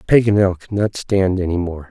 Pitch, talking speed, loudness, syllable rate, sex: 95 Hz, 190 wpm, -18 LUFS, 5.1 syllables/s, male